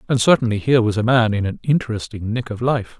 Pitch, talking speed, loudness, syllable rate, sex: 115 Hz, 240 wpm, -19 LUFS, 6.5 syllables/s, male